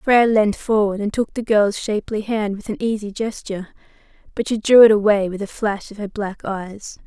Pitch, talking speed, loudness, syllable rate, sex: 210 Hz, 210 wpm, -19 LUFS, 5.2 syllables/s, female